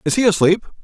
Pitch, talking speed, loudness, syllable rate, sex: 190 Hz, 215 wpm, -16 LUFS, 6.4 syllables/s, male